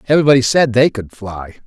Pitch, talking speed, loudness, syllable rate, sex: 120 Hz, 180 wpm, -13 LUFS, 6.5 syllables/s, male